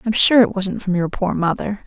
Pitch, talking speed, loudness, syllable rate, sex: 195 Hz, 255 wpm, -18 LUFS, 5.2 syllables/s, female